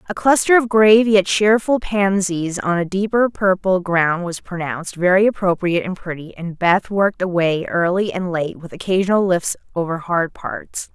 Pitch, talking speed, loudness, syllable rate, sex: 185 Hz, 170 wpm, -18 LUFS, 4.8 syllables/s, female